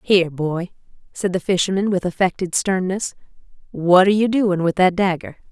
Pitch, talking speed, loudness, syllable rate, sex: 185 Hz, 165 wpm, -19 LUFS, 5.3 syllables/s, female